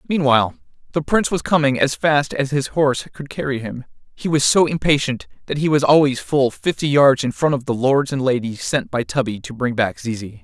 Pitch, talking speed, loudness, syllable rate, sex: 135 Hz, 220 wpm, -19 LUFS, 5.4 syllables/s, male